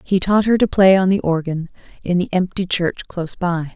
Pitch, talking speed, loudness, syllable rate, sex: 180 Hz, 225 wpm, -18 LUFS, 5.1 syllables/s, female